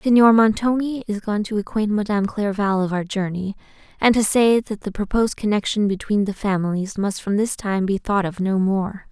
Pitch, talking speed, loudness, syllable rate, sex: 205 Hz, 200 wpm, -20 LUFS, 5.2 syllables/s, female